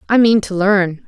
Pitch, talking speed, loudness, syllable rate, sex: 200 Hz, 225 wpm, -14 LUFS, 4.5 syllables/s, female